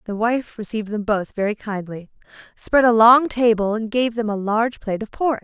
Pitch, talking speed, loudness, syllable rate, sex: 220 Hz, 210 wpm, -19 LUFS, 5.8 syllables/s, female